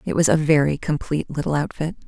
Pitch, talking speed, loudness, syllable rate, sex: 150 Hz, 200 wpm, -21 LUFS, 6.4 syllables/s, female